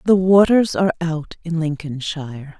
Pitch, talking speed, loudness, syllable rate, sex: 165 Hz, 140 wpm, -18 LUFS, 4.8 syllables/s, female